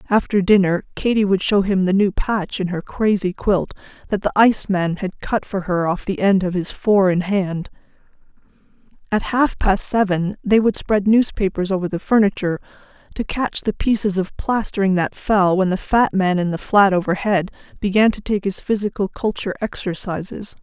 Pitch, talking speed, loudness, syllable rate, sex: 195 Hz, 180 wpm, -19 LUFS, 5.0 syllables/s, female